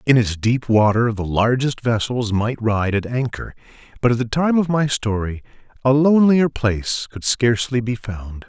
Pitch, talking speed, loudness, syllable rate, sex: 120 Hz, 175 wpm, -19 LUFS, 4.7 syllables/s, male